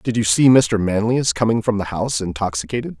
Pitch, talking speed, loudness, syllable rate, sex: 105 Hz, 200 wpm, -18 LUFS, 5.8 syllables/s, male